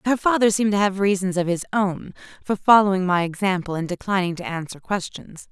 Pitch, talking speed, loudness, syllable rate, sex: 190 Hz, 195 wpm, -21 LUFS, 5.8 syllables/s, female